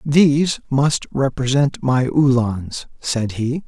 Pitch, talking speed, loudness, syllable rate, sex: 135 Hz, 115 wpm, -18 LUFS, 3.3 syllables/s, male